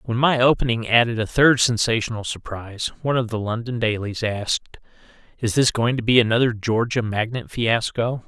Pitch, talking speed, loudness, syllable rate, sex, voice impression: 115 Hz, 165 wpm, -21 LUFS, 5.3 syllables/s, male, masculine, very adult-like, muffled, sincere, slightly calm, slightly reassuring